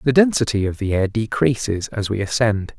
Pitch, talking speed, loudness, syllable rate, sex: 110 Hz, 195 wpm, -20 LUFS, 5.2 syllables/s, male